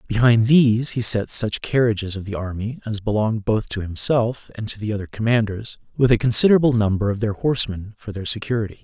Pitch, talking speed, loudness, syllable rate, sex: 110 Hz, 195 wpm, -20 LUFS, 5.9 syllables/s, male